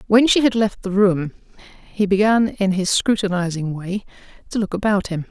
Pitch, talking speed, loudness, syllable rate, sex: 200 Hz, 180 wpm, -19 LUFS, 5.1 syllables/s, female